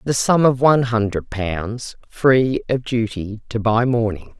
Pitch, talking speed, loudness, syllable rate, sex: 115 Hz, 165 wpm, -19 LUFS, 4.0 syllables/s, female